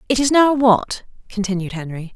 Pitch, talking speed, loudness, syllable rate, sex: 220 Hz, 165 wpm, -17 LUFS, 5.2 syllables/s, female